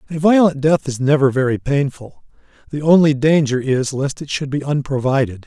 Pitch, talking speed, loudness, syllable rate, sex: 140 Hz, 175 wpm, -17 LUFS, 5.2 syllables/s, male